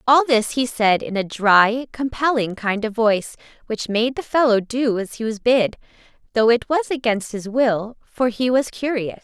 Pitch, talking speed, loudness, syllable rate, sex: 235 Hz, 195 wpm, -20 LUFS, 4.5 syllables/s, female